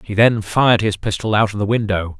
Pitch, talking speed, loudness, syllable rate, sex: 105 Hz, 245 wpm, -17 LUFS, 5.7 syllables/s, male